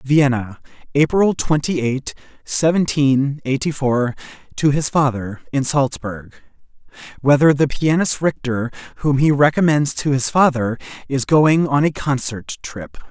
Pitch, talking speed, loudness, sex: 140 Hz, 130 wpm, -18 LUFS, male